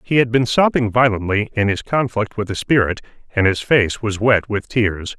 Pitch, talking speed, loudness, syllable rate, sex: 110 Hz, 210 wpm, -18 LUFS, 4.8 syllables/s, male